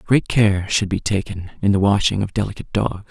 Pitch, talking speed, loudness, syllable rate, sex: 100 Hz, 215 wpm, -19 LUFS, 5.7 syllables/s, male